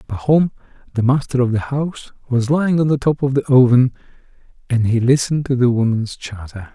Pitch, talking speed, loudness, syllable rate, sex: 130 Hz, 185 wpm, -17 LUFS, 5.8 syllables/s, male